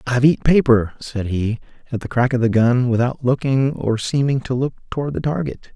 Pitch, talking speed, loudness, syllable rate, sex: 125 Hz, 210 wpm, -19 LUFS, 5.3 syllables/s, male